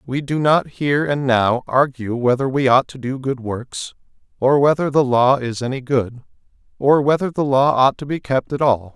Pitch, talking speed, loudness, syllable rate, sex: 135 Hz, 210 wpm, -18 LUFS, 4.8 syllables/s, male